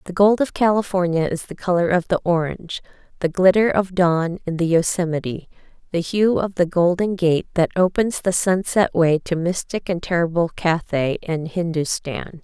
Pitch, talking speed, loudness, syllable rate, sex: 175 Hz, 170 wpm, -20 LUFS, 4.8 syllables/s, female